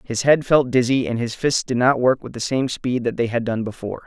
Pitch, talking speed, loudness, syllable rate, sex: 120 Hz, 280 wpm, -20 LUFS, 5.6 syllables/s, male